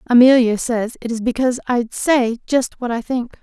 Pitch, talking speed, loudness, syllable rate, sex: 240 Hz, 190 wpm, -18 LUFS, 5.0 syllables/s, female